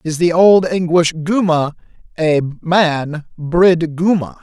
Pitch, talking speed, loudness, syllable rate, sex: 165 Hz, 135 wpm, -15 LUFS, 3.7 syllables/s, male